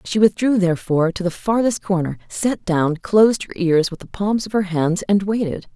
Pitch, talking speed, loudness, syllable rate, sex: 190 Hz, 210 wpm, -19 LUFS, 5.1 syllables/s, female